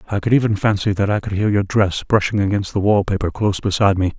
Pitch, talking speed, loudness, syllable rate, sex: 100 Hz, 260 wpm, -18 LUFS, 6.6 syllables/s, male